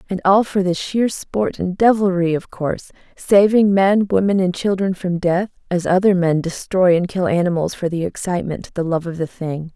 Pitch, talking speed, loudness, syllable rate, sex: 185 Hz, 190 wpm, -18 LUFS, 5.0 syllables/s, female